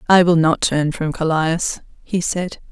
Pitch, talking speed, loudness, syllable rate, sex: 165 Hz, 175 wpm, -18 LUFS, 4.0 syllables/s, female